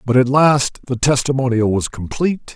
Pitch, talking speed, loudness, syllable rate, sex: 130 Hz, 165 wpm, -17 LUFS, 5.1 syllables/s, male